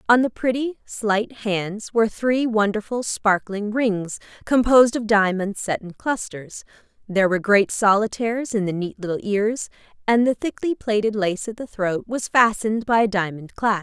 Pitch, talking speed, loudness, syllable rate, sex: 215 Hz, 170 wpm, -21 LUFS, 4.7 syllables/s, female